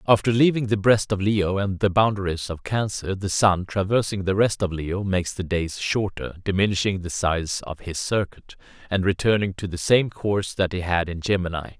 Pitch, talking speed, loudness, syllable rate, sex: 95 Hz, 200 wpm, -23 LUFS, 5.1 syllables/s, male